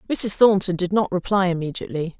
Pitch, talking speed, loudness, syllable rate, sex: 185 Hz, 165 wpm, -20 LUFS, 6.1 syllables/s, female